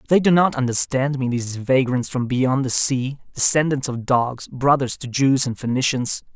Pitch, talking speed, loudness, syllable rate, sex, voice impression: 130 Hz, 180 wpm, -20 LUFS, 4.8 syllables/s, male, very feminine, very adult-like, slightly thick, slightly tensed, slightly powerful, slightly dark, soft, clear, fluent, slightly raspy, cool, very intellectual, very refreshing, sincere, calm, slightly mature, very friendly, very reassuring, very unique, very elegant, wild, slightly sweet, lively, slightly strict, slightly intense